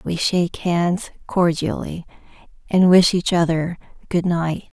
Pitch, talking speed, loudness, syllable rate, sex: 175 Hz, 125 wpm, -19 LUFS, 4.0 syllables/s, female